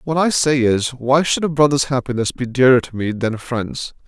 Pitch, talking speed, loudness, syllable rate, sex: 130 Hz, 235 wpm, -17 LUFS, 5.2 syllables/s, male